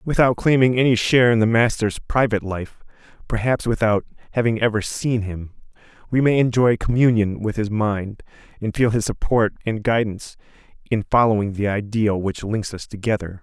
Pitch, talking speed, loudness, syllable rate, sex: 110 Hz, 160 wpm, -20 LUFS, 5.3 syllables/s, male